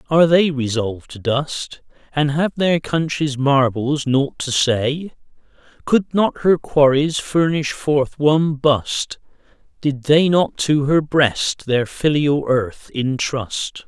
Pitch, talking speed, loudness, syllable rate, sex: 145 Hz, 135 wpm, -18 LUFS, 3.4 syllables/s, male